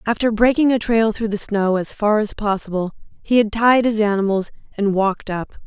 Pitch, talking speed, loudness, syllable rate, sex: 210 Hz, 200 wpm, -19 LUFS, 5.2 syllables/s, female